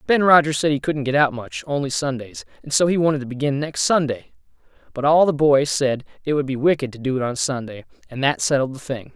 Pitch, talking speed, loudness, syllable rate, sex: 140 Hz, 240 wpm, -20 LUFS, 5.9 syllables/s, male